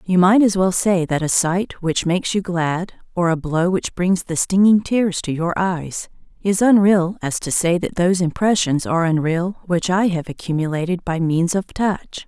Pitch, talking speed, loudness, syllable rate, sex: 180 Hz, 200 wpm, -19 LUFS, 4.6 syllables/s, female